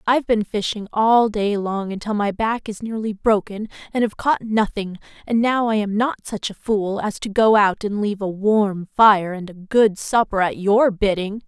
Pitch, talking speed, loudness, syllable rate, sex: 210 Hz, 215 wpm, -20 LUFS, 4.6 syllables/s, female